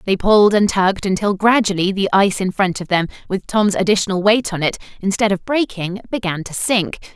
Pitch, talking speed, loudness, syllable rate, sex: 195 Hz, 200 wpm, -17 LUFS, 5.6 syllables/s, female